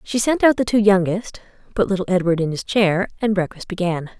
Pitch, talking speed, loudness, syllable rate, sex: 195 Hz, 215 wpm, -19 LUFS, 5.6 syllables/s, female